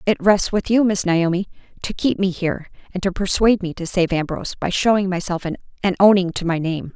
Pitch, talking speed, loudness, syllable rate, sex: 185 Hz, 215 wpm, -19 LUFS, 6.0 syllables/s, female